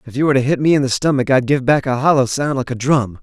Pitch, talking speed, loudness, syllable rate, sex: 135 Hz, 335 wpm, -16 LUFS, 6.8 syllables/s, male